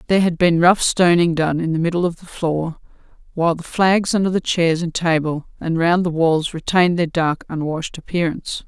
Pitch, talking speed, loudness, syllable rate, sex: 170 Hz, 200 wpm, -18 LUFS, 5.4 syllables/s, female